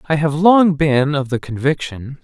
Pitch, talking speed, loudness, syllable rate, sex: 150 Hz, 190 wpm, -16 LUFS, 4.2 syllables/s, male